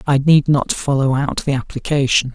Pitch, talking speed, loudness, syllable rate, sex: 135 Hz, 180 wpm, -17 LUFS, 5.0 syllables/s, male